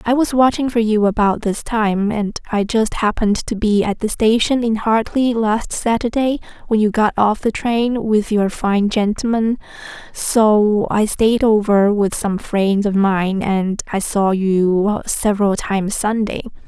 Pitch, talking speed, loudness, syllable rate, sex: 215 Hz, 170 wpm, -17 LUFS, 4.1 syllables/s, female